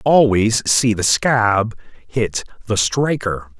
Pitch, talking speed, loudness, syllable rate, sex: 115 Hz, 115 wpm, -17 LUFS, 3.2 syllables/s, male